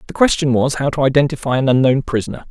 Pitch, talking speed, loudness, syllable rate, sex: 135 Hz, 215 wpm, -16 LUFS, 6.9 syllables/s, male